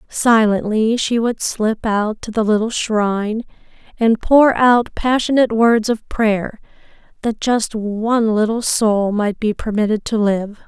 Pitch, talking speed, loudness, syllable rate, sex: 220 Hz, 145 wpm, -17 LUFS, 4.0 syllables/s, female